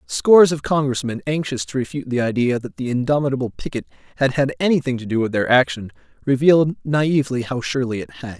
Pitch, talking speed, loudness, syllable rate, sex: 135 Hz, 185 wpm, -19 LUFS, 6.3 syllables/s, male